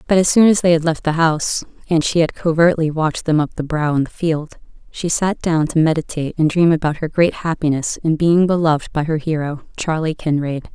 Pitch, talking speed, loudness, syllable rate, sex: 160 Hz, 225 wpm, -17 LUFS, 5.6 syllables/s, female